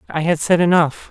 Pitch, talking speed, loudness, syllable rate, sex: 165 Hz, 215 wpm, -16 LUFS, 5.4 syllables/s, male